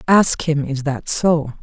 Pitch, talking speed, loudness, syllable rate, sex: 150 Hz, 185 wpm, -18 LUFS, 3.5 syllables/s, female